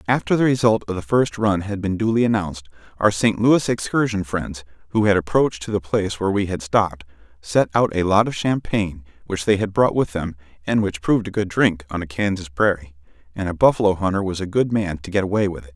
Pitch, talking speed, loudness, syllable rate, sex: 100 Hz, 225 wpm, -20 LUFS, 6.0 syllables/s, male